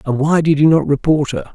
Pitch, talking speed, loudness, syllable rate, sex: 145 Hz, 270 wpm, -14 LUFS, 5.9 syllables/s, male